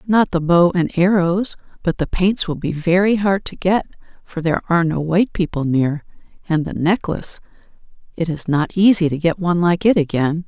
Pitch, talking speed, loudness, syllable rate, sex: 175 Hz, 190 wpm, -18 LUFS, 5.3 syllables/s, female